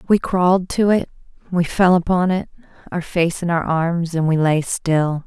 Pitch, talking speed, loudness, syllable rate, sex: 175 Hz, 195 wpm, -18 LUFS, 4.5 syllables/s, female